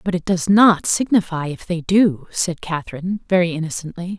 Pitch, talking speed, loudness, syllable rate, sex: 175 Hz, 170 wpm, -19 LUFS, 5.3 syllables/s, female